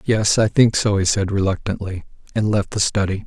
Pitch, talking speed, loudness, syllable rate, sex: 100 Hz, 200 wpm, -19 LUFS, 5.2 syllables/s, male